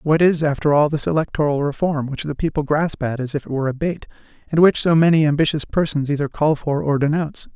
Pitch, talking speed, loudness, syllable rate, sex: 150 Hz, 230 wpm, -19 LUFS, 6.1 syllables/s, male